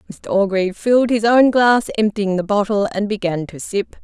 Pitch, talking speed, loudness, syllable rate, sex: 210 Hz, 195 wpm, -17 LUFS, 5.1 syllables/s, female